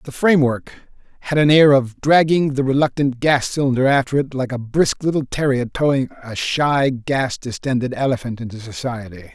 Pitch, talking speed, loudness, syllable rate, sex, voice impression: 135 Hz, 165 wpm, -18 LUFS, 5.2 syllables/s, male, very masculine, very adult-like, slightly old, very thick, tensed, very powerful, slightly dark, slightly hard, clear, fluent, very cool, very intellectual, very sincere, very calm, very mature, friendly, very reassuring, unique, elegant, wild, sweet, slightly lively, kind